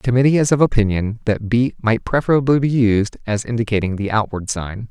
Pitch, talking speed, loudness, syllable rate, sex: 115 Hz, 195 wpm, -18 LUFS, 5.7 syllables/s, male